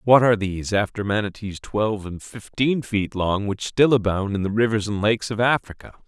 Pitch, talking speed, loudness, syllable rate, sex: 105 Hz, 195 wpm, -22 LUFS, 5.5 syllables/s, male